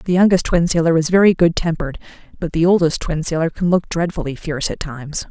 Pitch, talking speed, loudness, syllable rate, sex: 165 Hz, 215 wpm, -17 LUFS, 6.3 syllables/s, female